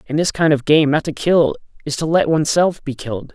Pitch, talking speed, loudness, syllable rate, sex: 150 Hz, 270 wpm, -17 LUFS, 5.8 syllables/s, male